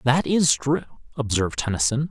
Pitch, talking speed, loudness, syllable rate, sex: 130 Hz, 145 wpm, -22 LUFS, 5.4 syllables/s, male